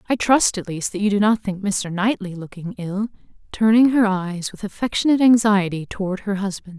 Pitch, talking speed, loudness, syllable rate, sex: 200 Hz, 195 wpm, -20 LUFS, 5.3 syllables/s, female